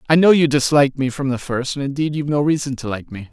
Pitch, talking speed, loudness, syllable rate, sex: 140 Hz, 290 wpm, -18 LUFS, 6.7 syllables/s, male